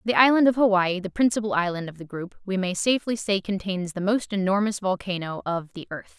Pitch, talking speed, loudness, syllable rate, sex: 195 Hz, 215 wpm, -24 LUFS, 5.7 syllables/s, female